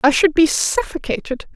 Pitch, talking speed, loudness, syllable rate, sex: 315 Hz, 155 wpm, -17 LUFS, 5.1 syllables/s, female